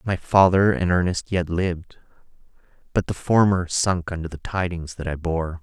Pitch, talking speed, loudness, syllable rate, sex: 90 Hz, 170 wpm, -22 LUFS, 4.8 syllables/s, male